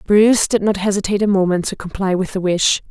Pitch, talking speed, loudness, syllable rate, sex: 195 Hz, 225 wpm, -17 LUFS, 6.3 syllables/s, female